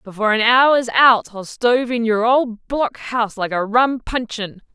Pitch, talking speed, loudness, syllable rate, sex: 230 Hz, 190 wpm, -17 LUFS, 4.5 syllables/s, female